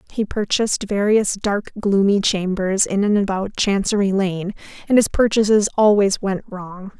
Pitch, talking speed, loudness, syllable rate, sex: 200 Hz, 145 wpm, -18 LUFS, 4.5 syllables/s, female